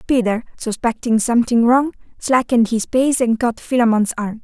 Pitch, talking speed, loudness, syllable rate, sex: 235 Hz, 150 wpm, -17 LUFS, 5.2 syllables/s, female